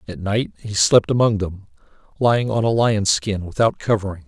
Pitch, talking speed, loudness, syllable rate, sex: 105 Hz, 180 wpm, -19 LUFS, 5.1 syllables/s, male